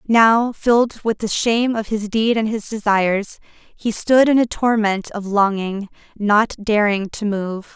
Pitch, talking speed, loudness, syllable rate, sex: 215 Hz, 170 wpm, -18 LUFS, 4.1 syllables/s, female